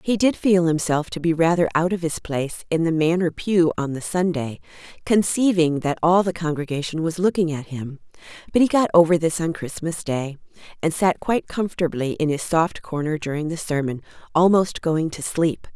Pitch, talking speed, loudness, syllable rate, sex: 165 Hz, 190 wpm, -21 LUFS, 5.3 syllables/s, female